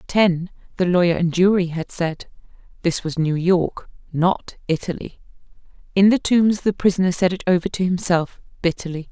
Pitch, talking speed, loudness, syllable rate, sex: 180 Hz, 160 wpm, -20 LUFS, 5.0 syllables/s, female